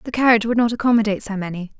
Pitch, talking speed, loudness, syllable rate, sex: 220 Hz, 235 wpm, -19 LUFS, 8.6 syllables/s, female